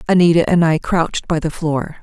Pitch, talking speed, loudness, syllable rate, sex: 165 Hz, 205 wpm, -16 LUFS, 5.5 syllables/s, female